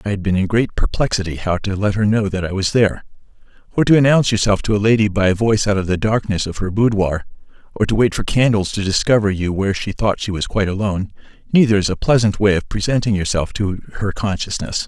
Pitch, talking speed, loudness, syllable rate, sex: 100 Hz, 230 wpm, -18 LUFS, 6.3 syllables/s, male